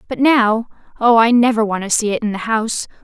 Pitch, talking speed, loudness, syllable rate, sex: 225 Hz, 235 wpm, -15 LUFS, 5.8 syllables/s, female